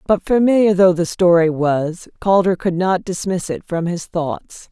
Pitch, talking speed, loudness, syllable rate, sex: 180 Hz, 180 wpm, -17 LUFS, 4.3 syllables/s, female